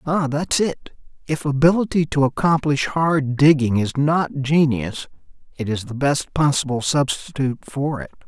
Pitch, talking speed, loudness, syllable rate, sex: 145 Hz, 145 wpm, -20 LUFS, 4.5 syllables/s, male